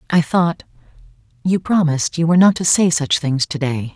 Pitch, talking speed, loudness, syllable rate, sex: 160 Hz, 150 wpm, -17 LUFS, 5.4 syllables/s, female